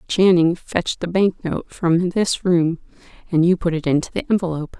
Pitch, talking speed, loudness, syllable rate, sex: 175 Hz, 190 wpm, -19 LUFS, 5.2 syllables/s, female